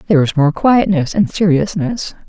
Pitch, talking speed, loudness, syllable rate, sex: 205 Hz, 160 wpm, -14 LUFS, 5.0 syllables/s, female